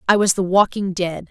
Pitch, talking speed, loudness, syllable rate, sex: 190 Hz, 230 wpm, -18 LUFS, 5.2 syllables/s, female